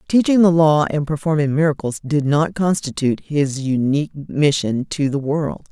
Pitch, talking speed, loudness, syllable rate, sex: 150 Hz, 160 wpm, -18 LUFS, 4.7 syllables/s, female